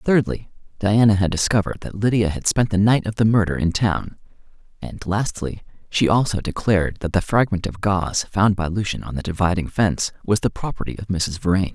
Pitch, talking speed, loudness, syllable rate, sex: 95 Hz, 195 wpm, -21 LUFS, 5.6 syllables/s, male